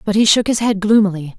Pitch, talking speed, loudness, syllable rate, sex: 205 Hz, 260 wpm, -14 LUFS, 6.2 syllables/s, female